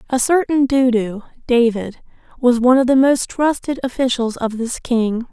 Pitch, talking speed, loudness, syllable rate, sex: 250 Hz, 160 wpm, -17 LUFS, 5.0 syllables/s, female